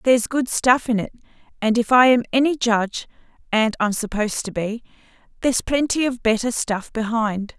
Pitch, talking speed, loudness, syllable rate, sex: 230 Hz, 175 wpm, -20 LUFS, 5.3 syllables/s, female